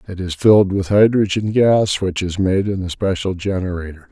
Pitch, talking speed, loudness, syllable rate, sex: 95 Hz, 190 wpm, -17 LUFS, 5.1 syllables/s, male